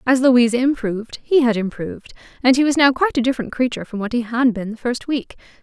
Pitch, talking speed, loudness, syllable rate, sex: 245 Hz, 235 wpm, -19 LUFS, 6.5 syllables/s, female